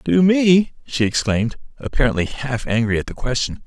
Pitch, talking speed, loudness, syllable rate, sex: 135 Hz, 165 wpm, -19 LUFS, 5.2 syllables/s, male